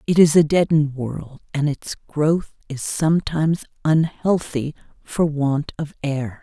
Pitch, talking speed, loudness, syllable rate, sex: 150 Hz, 140 wpm, -21 LUFS, 4.2 syllables/s, female